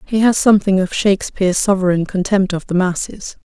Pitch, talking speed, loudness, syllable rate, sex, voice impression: 190 Hz, 175 wpm, -16 LUFS, 5.8 syllables/s, female, very feminine, adult-like, slightly middle-aged, thin, slightly relaxed, slightly weak, dark, hard, very clear, very fluent, slightly cute, refreshing, sincere, slightly calm, friendly, reassuring, very unique, very elegant, slightly wild, very sweet, slightly lively, kind, modest, slightly light